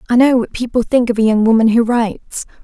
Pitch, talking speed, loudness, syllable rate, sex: 230 Hz, 250 wpm, -14 LUFS, 6.1 syllables/s, female